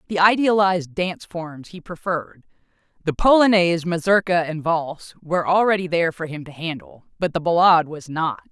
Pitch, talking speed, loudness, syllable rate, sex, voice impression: 170 Hz, 160 wpm, -20 LUFS, 5.6 syllables/s, female, feminine, adult-like, slightly cool, intellectual, slightly calm, slightly strict